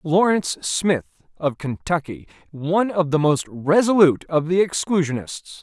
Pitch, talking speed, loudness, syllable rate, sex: 165 Hz, 130 wpm, -20 LUFS, 4.6 syllables/s, male